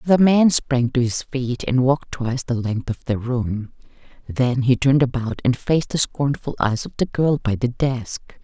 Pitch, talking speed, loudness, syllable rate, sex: 130 Hz, 205 wpm, -20 LUFS, 4.7 syllables/s, female